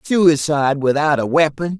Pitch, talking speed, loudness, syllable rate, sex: 150 Hz, 135 wpm, -16 LUFS, 4.7 syllables/s, male